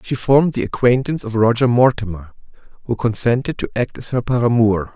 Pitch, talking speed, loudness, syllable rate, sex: 120 Hz, 170 wpm, -17 LUFS, 5.9 syllables/s, male